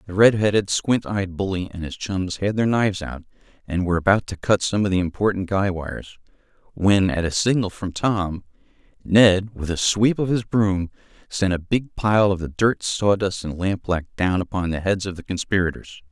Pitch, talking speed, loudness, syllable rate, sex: 95 Hz, 200 wpm, -21 LUFS, 5.0 syllables/s, male